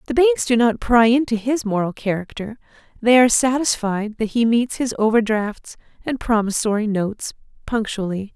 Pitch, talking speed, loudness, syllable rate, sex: 225 Hz, 150 wpm, -19 LUFS, 5.1 syllables/s, female